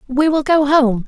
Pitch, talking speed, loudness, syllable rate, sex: 275 Hz, 225 wpm, -14 LUFS, 4.4 syllables/s, female